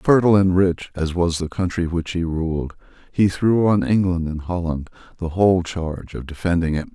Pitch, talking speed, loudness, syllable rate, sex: 85 Hz, 190 wpm, -20 LUFS, 5.1 syllables/s, male